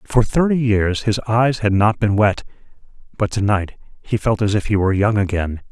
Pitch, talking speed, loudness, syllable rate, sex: 105 Hz, 200 wpm, -18 LUFS, 5.2 syllables/s, male